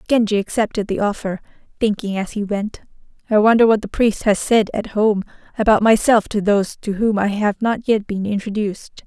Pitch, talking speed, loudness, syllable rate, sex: 210 Hz, 190 wpm, -18 LUFS, 5.4 syllables/s, female